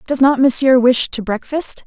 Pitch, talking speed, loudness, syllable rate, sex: 260 Hz, 195 wpm, -14 LUFS, 4.6 syllables/s, female